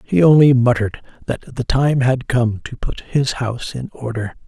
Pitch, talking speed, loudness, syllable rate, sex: 125 Hz, 190 wpm, -18 LUFS, 4.7 syllables/s, male